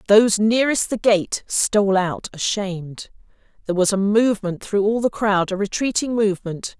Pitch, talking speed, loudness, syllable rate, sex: 205 Hz, 150 wpm, -20 LUFS, 5.2 syllables/s, female